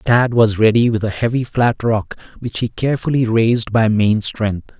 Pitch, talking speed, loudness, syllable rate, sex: 115 Hz, 190 wpm, -16 LUFS, 4.8 syllables/s, male